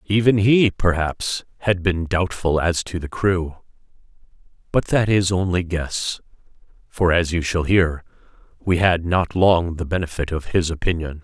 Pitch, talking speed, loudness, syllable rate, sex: 90 Hz, 155 wpm, -20 LUFS, 4.3 syllables/s, male